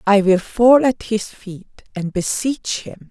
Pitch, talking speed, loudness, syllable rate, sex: 210 Hz, 175 wpm, -17 LUFS, 3.5 syllables/s, female